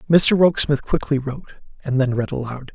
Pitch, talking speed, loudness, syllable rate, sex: 140 Hz, 175 wpm, -18 LUFS, 5.6 syllables/s, male